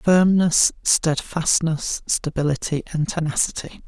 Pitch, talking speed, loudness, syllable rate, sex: 160 Hz, 75 wpm, -20 LUFS, 3.9 syllables/s, male